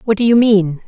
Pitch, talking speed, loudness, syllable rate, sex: 210 Hz, 275 wpm, -12 LUFS, 5.5 syllables/s, female